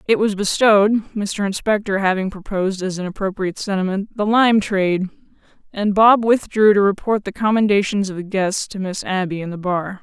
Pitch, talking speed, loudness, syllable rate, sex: 200 Hz, 180 wpm, -18 LUFS, 3.3 syllables/s, female